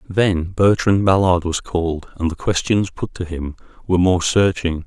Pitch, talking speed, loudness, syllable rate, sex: 90 Hz, 175 wpm, -18 LUFS, 4.6 syllables/s, male